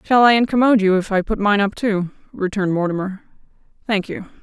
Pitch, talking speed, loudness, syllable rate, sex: 205 Hz, 190 wpm, -18 LUFS, 6.3 syllables/s, female